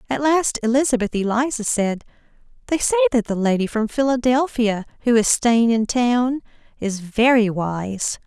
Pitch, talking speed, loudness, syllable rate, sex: 235 Hz, 145 wpm, -19 LUFS, 4.6 syllables/s, female